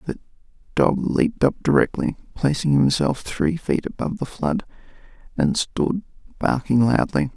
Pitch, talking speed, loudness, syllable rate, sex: 150 Hz, 130 wpm, -22 LUFS, 4.7 syllables/s, male